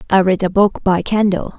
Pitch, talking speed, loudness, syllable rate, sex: 190 Hz, 230 wpm, -15 LUFS, 5.3 syllables/s, female